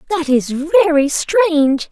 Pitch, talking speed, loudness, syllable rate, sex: 315 Hz, 125 wpm, -14 LUFS, 3.6 syllables/s, female